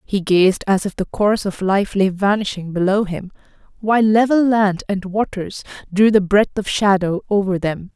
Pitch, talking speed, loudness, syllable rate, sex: 200 Hz, 180 wpm, -17 LUFS, 4.8 syllables/s, female